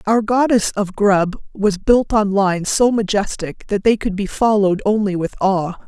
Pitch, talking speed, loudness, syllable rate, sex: 205 Hz, 185 wpm, -17 LUFS, 4.6 syllables/s, female